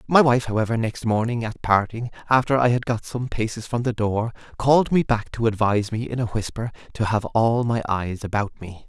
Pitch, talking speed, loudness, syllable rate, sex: 115 Hz, 215 wpm, -22 LUFS, 5.5 syllables/s, male